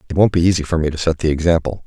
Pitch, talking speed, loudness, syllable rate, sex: 80 Hz, 320 wpm, -17 LUFS, 7.8 syllables/s, male